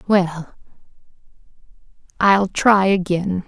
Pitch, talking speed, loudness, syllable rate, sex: 185 Hz, 70 wpm, -17 LUFS, 3.0 syllables/s, female